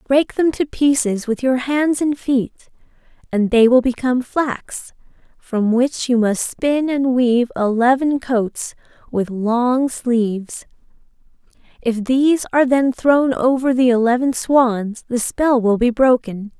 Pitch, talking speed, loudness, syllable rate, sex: 250 Hz, 145 wpm, -17 LUFS, 3.9 syllables/s, female